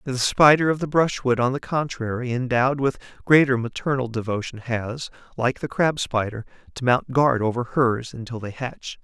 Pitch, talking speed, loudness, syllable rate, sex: 125 Hz, 175 wpm, -22 LUFS, 4.9 syllables/s, male